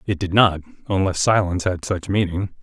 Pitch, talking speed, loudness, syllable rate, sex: 95 Hz, 160 wpm, -20 LUFS, 5.6 syllables/s, male